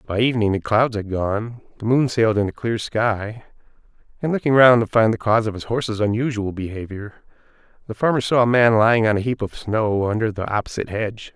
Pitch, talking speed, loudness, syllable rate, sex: 110 Hz, 210 wpm, -20 LUFS, 6.0 syllables/s, male